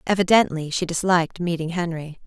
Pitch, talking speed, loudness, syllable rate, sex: 170 Hz, 130 wpm, -21 LUFS, 5.7 syllables/s, female